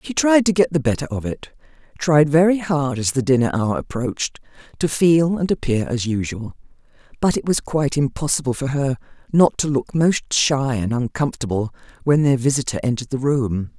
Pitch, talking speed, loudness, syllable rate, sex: 140 Hz, 185 wpm, -19 LUFS, 5.3 syllables/s, female